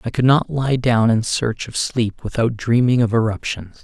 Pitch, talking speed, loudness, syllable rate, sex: 120 Hz, 205 wpm, -18 LUFS, 4.6 syllables/s, male